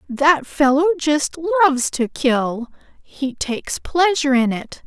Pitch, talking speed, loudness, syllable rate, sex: 290 Hz, 135 wpm, -18 LUFS, 4.1 syllables/s, female